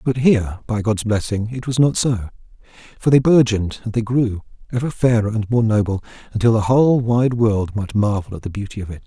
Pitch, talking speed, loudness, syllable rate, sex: 110 Hz, 210 wpm, -18 LUFS, 5.7 syllables/s, male